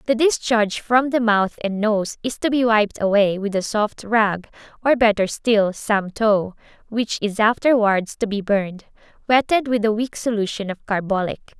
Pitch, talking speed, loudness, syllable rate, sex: 215 Hz, 165 wpm, -20 LUFS, 4.6 syllables/s, female